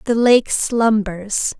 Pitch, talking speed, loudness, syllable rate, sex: 220 Hz, 115 wpm, -17 LUFS, 2.8 syllables/s, female